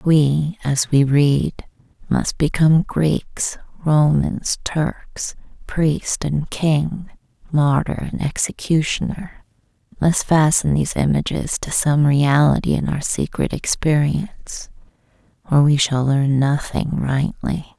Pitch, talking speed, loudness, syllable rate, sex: 150 Hz, 110 wpm, -19 LUFS, 3.5 syllables/s, female